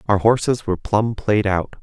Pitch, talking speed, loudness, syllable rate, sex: 105 Hz, 200 wpm, -19 LUFS, 5.0 syllables/s, male